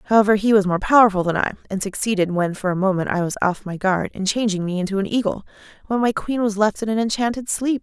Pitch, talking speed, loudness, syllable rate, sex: 205 Hz, 255 wpm, -20 LUFS, 6.6 syllables/s, female